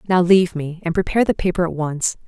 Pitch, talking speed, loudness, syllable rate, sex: 175 Hz, 235 wpm, -19 LUFS, 6.5 syllables/s, female